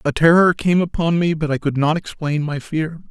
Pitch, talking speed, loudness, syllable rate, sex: 160 Hz, 230 wpm, -18 LUFS, 5.2 syllables/s, male